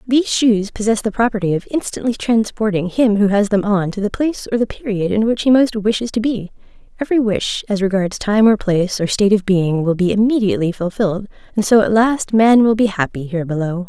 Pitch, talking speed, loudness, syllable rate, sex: 210 Hz, 220 wpm, -16 LUFS, 5.9 syllables/s, female